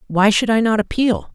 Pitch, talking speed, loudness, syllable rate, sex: 210 Hz, 225 wpm, -17 LUFS, 5.4 syllables/s, male